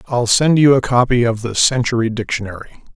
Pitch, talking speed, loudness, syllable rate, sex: 120 Hz, 185 wpm, -15 LUFS, 5.5 syllables/s, male